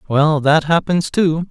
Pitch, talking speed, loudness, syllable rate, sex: 160 Hz, 160 wpm, -15 LUFS, 3.7 syllables/s, male